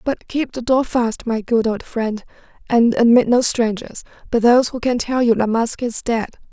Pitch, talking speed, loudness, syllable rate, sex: 235 Hz, 210 wpm, -18 LUFS, 4.7 syllables/s, female